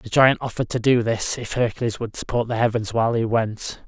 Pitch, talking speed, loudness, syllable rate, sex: 115 Hz, 230 wpm, -22 LUFS, 5.8 syllables/s, male